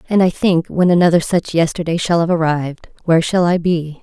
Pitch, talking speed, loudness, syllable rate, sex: 170 Hz, 210 wpm, -15 LUFS, 5.7 syllables/s, female